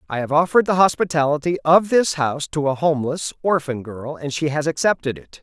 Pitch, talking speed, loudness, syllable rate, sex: 150 Hz, 200 wpm, -19 LUFS, 5.9 syllables/s, male